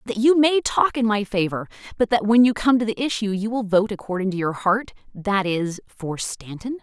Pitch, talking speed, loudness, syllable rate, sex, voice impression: 215 Hz, 230 wpm, -21 LUFS, 5.2 syllables/s, female, feminine, slightly gender-neutral, adult-like, slightly middle-aged, slightly thin, tensed, slightly powerful, bright, slightly hard, clear, fluent, cool, intellectual, slightly refreshing, sincere, slightly calm, slightly friendly, slightly elegant, slightly sweet, lively, strict, slightly intense, slightly sharp